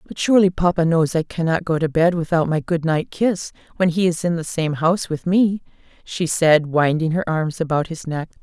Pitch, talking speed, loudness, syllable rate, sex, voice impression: 165 Hz, 220 wpm, -19 LUFS, 5.2 syllables/s, female, very feminine, adult-like, slightly middle-aged, thin, tensed, slightly powerful, bright, slightly soft, clear, fluent, cool, intellectual, refreshing, sincere, slightly calm, slightly friendly, slightly reassuring, unique, slightly elegant, wild, lively, slightly kind, strict, intense